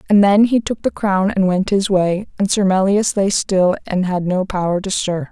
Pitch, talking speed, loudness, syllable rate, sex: 195 Hz, 235 wpm, -17 LUFS, 4.7 syllables/s, female